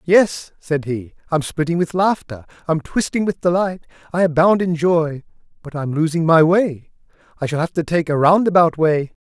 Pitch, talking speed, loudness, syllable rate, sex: 165 Hz, 180 wpm, -18 LUFS, 4.8 syllables/s, male